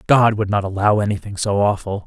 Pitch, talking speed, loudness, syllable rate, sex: 100 Hz, 205 wpm, -18 LUFS, 5.8 syllables/s, male